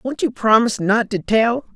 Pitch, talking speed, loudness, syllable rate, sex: 230 Hz, 205 wpm, -17 LUFS, 4.9 syllables/s, female